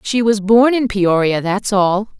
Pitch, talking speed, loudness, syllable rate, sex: 205 Hz, 190 wpm, -15 LUFS, 4.0 syllables/s, female